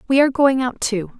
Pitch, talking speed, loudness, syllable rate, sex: 250 Hz, 250 wpm, -18 LUFS, 5.9 syllables/s, female